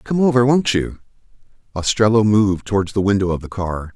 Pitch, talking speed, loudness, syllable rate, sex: 105 Hz, 180 wpm, -17 LUFS, 5.8 syllables/s, male